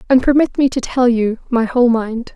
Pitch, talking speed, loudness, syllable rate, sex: 245 Hz, 230 wpm, -15 LUFS, 5.3 syllables/s, female